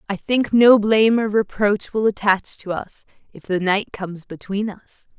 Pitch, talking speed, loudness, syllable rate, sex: 205 Hz, 185 wpm, -19 LUFS, 4.6 syllables/s, female